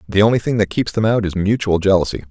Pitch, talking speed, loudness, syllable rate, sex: 100 Hz, 260 wpm, -17 LUFS, 6.6 syllables/s, male